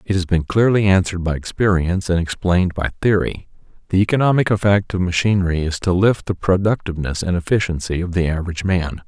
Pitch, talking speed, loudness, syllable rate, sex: 90 Hz, 180 wpm, -18 LUFS, 6.3 syllables/s, male